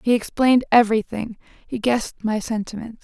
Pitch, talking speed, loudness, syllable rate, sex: 225 Hz, 140 wpm, -20 LUFS, 6.1 syllables/s, female